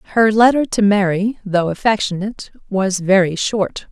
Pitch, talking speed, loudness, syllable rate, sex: 200 Hz, 140 wpm, -16 LUFS, 4.8 syllables/s, female